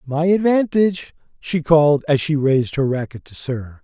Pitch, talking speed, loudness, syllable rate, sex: 150 Hz, 170 wpm, -18 LUFS, 5.3 syllables/s, male